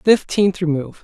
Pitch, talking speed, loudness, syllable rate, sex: 175 Hz, 175 wpm, -18 LUFS, 6.6 syllables/s, male